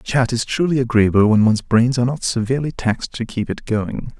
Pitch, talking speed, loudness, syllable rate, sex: 120 Hz, 215 wpm, -18 LUFS, 5.8 syllables/s, male